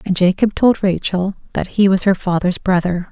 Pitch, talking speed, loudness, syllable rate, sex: 190 Hz, 195 wpm, -16 LUFS, 5.0 syllables/s, female